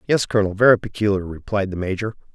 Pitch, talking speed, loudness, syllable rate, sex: 100 Hz, 180 wpm, -20 LUFS, 6.8 syllables/s, male